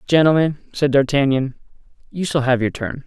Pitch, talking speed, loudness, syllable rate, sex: 140 Hz, 155 wpm, -18 LUFS, 5.4 syllables/s, male